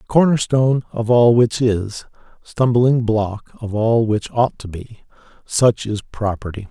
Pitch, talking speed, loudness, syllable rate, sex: 115 Hz, 145 wpm, -17 LUFS, 3.9 syllables/s, male